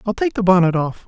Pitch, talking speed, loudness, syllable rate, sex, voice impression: 195 Hz, 280 wpm, -17 LUFS, 6.3 syllables/s, male, masculine, very adult-like, slightly old, thick, slightly relaxed, slightly weak, slightly dark, slightly soft, slightly muffled, slightly fluent, slightly raspy, slightly cool, intellectual, sincere, slightly calm, mature, very unique, slightly sweet, kind, modest